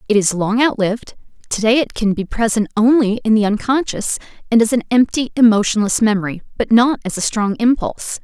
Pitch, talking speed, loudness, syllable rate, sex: 220 Hz, 190 wpm, -16 LUFS, 5.8 syllables/s, female